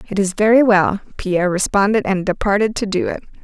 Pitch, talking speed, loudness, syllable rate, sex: 200 Hz, 190 wpm, -17 LUFS, 5.8 syllables/s, female